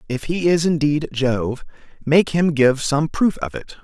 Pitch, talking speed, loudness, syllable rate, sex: 145 Hz, 190 wpm, -19 LUFS, 4.1 syllables/s, male